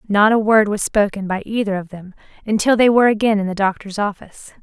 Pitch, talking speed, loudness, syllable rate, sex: 205 Hz, 220 wpm, -17 LUFS, 6.1 syllables/s, female